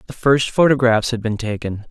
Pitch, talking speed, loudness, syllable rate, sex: 120 Hz, 190 wpm, -17 LUFS, 5.2 syllables/s, male